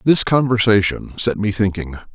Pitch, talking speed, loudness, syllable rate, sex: 105 Hz, 140 wpm, -17 LUFS, 4.9 syllables/s, male